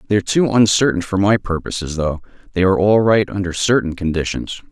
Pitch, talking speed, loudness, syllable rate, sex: 95 Hz, 180 wpm, -17 LUFS, 5.9 syllables/s, male